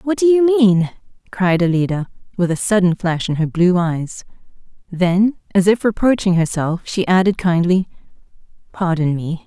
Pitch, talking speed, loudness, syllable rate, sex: 185 Hz, 150 wpm, -17 LUFS, 4.6 syllables/s, female